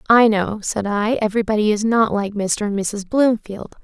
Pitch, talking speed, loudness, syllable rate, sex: 215 Hz, 190 wpm, -19 LUFS, 4.8 syllables/s, female